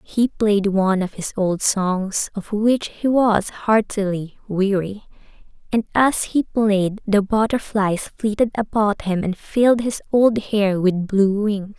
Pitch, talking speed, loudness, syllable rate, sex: 205 Hz, 155 wpm, -20 LUFS, 3.7 syllables/s, female